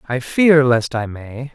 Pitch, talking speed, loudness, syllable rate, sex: 130 Hz, 195 wpm, -15 LUFS, 3.7 syllables/s, male